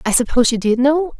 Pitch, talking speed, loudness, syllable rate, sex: 260 Hz, 250 wpm, -15 LUFS, 6.7 syllables/s, female